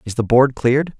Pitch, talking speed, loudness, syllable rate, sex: 130 Hz, 240 wpm, -16 LUFS, 6.0 syllables/s, male